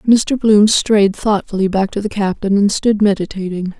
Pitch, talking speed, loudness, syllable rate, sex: 205 Hz, 175 wpm, -15 LUFS, 4.7 syllables/s, female